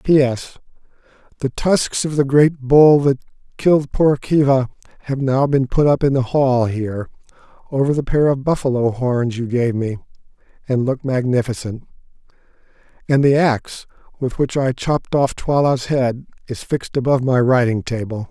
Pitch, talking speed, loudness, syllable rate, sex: 130 Hz, 155 wpm, -17 LUFS, 4.9 syllables/s, male